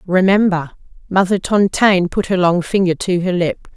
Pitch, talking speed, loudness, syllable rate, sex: 185 Hz, 160 wpm, -16 LUFS, 4.9 syllables/s, female